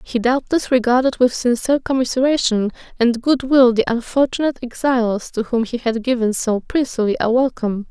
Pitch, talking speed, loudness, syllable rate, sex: 245 Hz, 160 wpm, -18 LUFS, 5.6 syllables/s, female